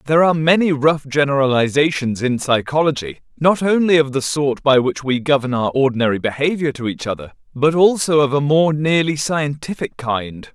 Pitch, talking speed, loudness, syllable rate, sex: 145 Hz, 170 wpm, -17 LUFS, 5.3 syllables/s, male